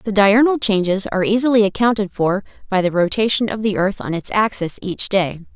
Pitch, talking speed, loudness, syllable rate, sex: 205 Hz, 195 wpm, -18 LUFS, 5.5 syllables/s, female